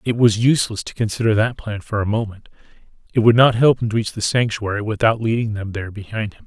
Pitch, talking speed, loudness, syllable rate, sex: 110 Hz, 225 wpm, -19 LUFS, 6.3 syllables/s, male